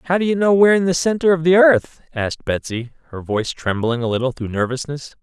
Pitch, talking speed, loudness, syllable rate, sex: 150 Hz, 230 wpm, -18 LUFS, 6.1 syllables/s, male